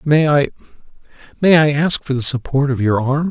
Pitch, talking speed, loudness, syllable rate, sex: 140 Hz, 180 wpm, -15 LUFS, 5.3 syllables/s, male